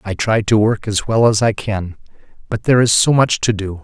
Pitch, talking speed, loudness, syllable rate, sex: 105 Hz, 250 wpm, -15 LUFS, 5.3 syllables/s, male